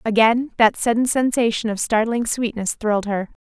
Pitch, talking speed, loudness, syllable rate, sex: 225 Hz, 155 wpm, -19 LUFS, 5.0 syllables/s, female